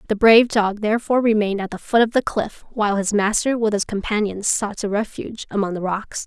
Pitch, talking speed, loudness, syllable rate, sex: 210 Hz, 220 wpm, -20 LUFS, 6.0 syllables/s, female